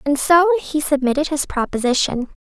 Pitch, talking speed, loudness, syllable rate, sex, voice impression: 290 Hz, 150 wpm, -18 LUFS, 5.3 syllables/s, female, very feminine, slightly young, slightly bright, cute, friendly, kind